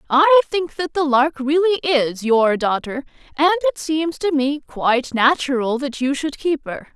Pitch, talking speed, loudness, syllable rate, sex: 290 Hz, 180 wpm, -18 LUFS, 4.3 syllables/s, female